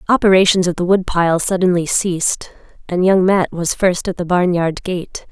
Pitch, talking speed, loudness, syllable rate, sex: 180 Hz, 180 wpm, -16 LUFS, 5.0 syllables/s, female